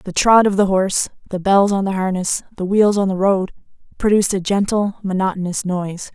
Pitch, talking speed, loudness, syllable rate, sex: 195 Hz, 195 wpm, -17 LUFS, 5.5 syllables/s, female